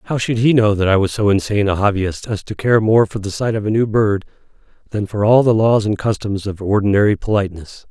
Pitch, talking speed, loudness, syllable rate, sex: 105 Hz, 245 wpm, -16 LUFS, 5.8 syllables/s, male